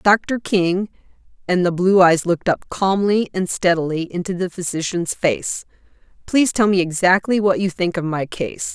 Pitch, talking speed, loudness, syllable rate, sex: 185 Hz, 170 wpm, -19 LUFS, 4.7 syllables/s, female